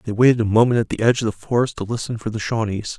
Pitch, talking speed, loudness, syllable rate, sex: 115 Hz, 300 wpm, -20 LUFS, 7.4 syllables/s, male